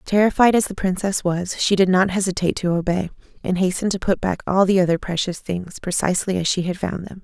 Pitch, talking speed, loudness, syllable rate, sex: 185 Hz, 225 wpm, -20 LUFS, 6.1 syllables/s, female